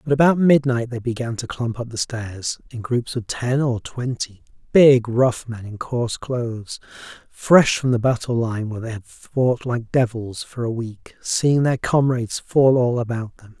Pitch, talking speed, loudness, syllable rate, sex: 120 Hz, 185 wpm, -20 LUFS, 4.4 syllables/s, male